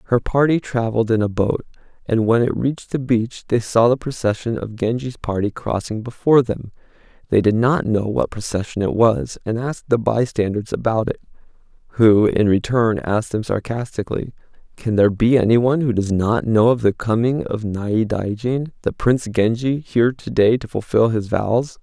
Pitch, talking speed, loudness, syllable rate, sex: 115 Hz, 180 wpm, -19 LUFS, 5.2 syllables/s, male